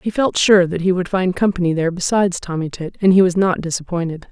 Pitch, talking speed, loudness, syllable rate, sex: 180 Hz, 235 wpm, -17 LUFS, 6.1 syllables/s, female